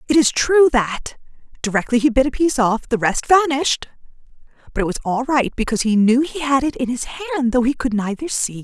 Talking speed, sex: 245 wpm, female